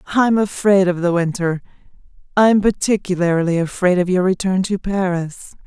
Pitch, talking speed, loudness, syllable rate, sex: 185 Hz, 160 wpm, -17 LUFS, 5.4 syllables/s, female